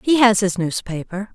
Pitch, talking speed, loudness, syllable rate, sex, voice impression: 205 Hz, 180 wpm, -19 LUFS, 4.8 syllables/s, female, slightly masculine, slightly feminine, very gender-neutral, slightly adult-like, slightly middle-aged, slightly thick, tensed, slightly powerful, bright, slightly soft, very clear, fluent, slightly nasal, slightly cool, very intellectual, very refreshing, sincere, slightly calm, slightly friendly, very unique, very wild, sweet, lively, kind